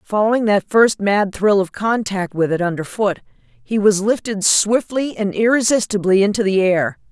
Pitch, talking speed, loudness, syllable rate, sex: 205 Hz, 160 wpm, -17 LUFS, 4.7 syllables/s, female